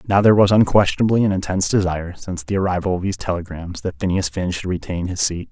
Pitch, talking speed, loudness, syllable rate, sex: 95 Hz, 195 wpm, -19 LUFS, 7.0 syllables/s, male